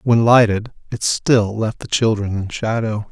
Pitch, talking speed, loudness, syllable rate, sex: 110 Hz, 175 wpm, -17 LUFS, 4.2 syllables/s, male